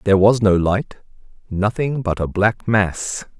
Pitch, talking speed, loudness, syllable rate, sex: 105 Hz, 160 wpm, -18 LUFS, 4.1 syllables/s, male